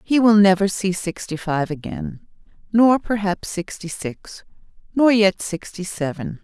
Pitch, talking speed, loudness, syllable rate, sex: 190 Hz, 140 wpm, -20 LUFS, 4.1 syllables/s, female